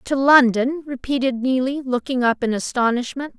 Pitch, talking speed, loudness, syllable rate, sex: 255 Hz, 140 wpm, -19 LUFS, 5.0 syllables/s, female